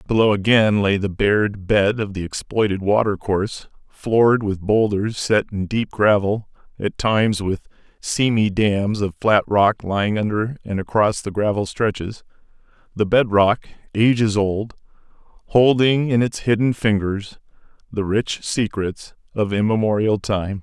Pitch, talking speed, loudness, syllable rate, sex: 105 Hz, 145 wpm, -19 LUFS, 4.4 syllables/s, male